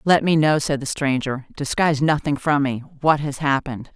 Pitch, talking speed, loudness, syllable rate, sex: 145 Hz, 165 wpm, -20 LUFS, 5.3 syllables/s, female